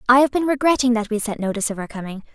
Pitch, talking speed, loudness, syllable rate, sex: 235 Hz, 280 wpm, -20 LUFS, 7.7 syllables/s, female